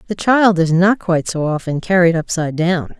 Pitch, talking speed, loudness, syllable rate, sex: 175 Hz, 200 wpm, -15 LUFS, 5.4 syllables/s, female